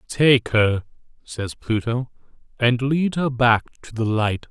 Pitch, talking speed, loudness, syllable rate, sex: 120 Hz, 145 wpm, -21 LUFS, 3.7 syllables/s, male